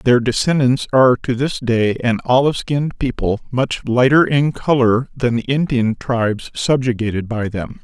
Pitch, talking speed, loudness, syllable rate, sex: 125 Hz, 160 wpm, -17 LUFS, 4.7 syllables/s, male